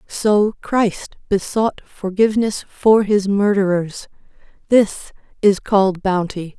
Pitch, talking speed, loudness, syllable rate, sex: 200 Hz, 100 wpm, -17 LUFS, 3.9 syllables/s, female